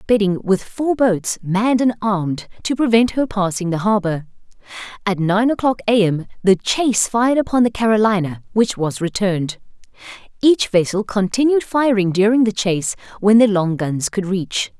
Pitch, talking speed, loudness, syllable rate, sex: 205 Hz, 160 wpm, -17 LUFS, 5.0 syllables/s, female